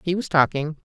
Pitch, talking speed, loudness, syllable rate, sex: 165 Hz, 195 wpm, -21 LUFS, 5.7 syllables/s, female